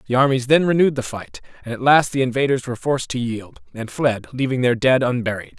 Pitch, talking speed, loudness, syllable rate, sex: 130 Hz, 225 wpm, -19 LUFS, 6.3 syllables/s, male